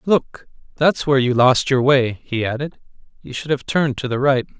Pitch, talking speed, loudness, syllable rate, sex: 135 Hz, 210 wpm, -18 LUFS, 5.3 syllables/s, male